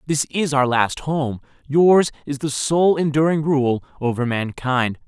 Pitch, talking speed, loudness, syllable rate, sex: 140 Hz, 155 wpm, -19 LUFS, 4.0 syllables/s, male